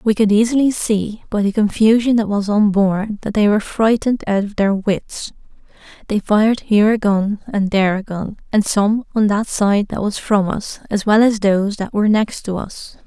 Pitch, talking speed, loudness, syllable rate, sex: 210 Hz, 210 wpm, -17 LUFS, 5.0 syllables/s, female